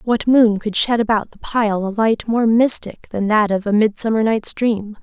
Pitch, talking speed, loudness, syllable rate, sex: 220 Hz, 215 wpm, -17 LUFS, 4.5 syllables/s, female